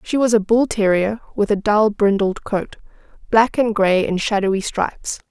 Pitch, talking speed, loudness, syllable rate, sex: 210 Hz, 170 wpm, -18 LUFS, 4.7 syllables/s, female